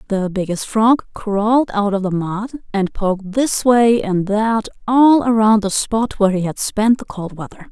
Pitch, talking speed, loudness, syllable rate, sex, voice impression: 210 Hz, 195 wpm, -17 LUFS, 4.4 syllables/s, female, very feminine, adult-like, slightly refreshing, friendly, slightly lively